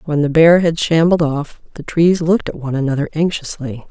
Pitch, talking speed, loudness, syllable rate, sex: 155 Hz, 200 wpm, -15 LUFS, 5.6 syllables/s, female